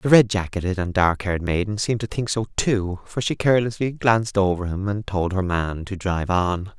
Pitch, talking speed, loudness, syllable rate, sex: 100 Hz, 220 wpm, -22 LUFS, 5.5 syllables/s, male